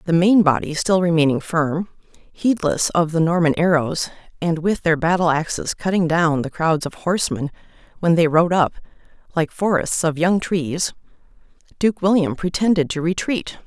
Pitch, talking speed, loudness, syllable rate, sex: 170 Hz, 160 wpm, -19 LUFS, 4.8 syllables/s, female